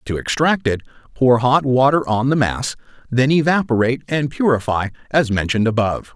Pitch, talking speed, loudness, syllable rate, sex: 125 Hz, 155 wpm, -18 LUFS, 5.5 syllables/s, male